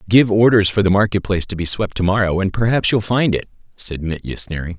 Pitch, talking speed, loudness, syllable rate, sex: 100 Hz, 240 wpm, -17 LUFS, 6.0 syllables/s, male